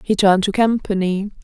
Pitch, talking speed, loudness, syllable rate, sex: 200 Hz, 165 wpm, -17 LUFS, 5.7 syllables/s, female